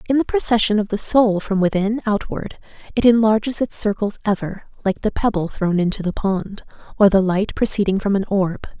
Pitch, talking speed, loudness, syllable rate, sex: 205 Hz, 190 wpm, -19 LUFS, 5.3 syllables/s, female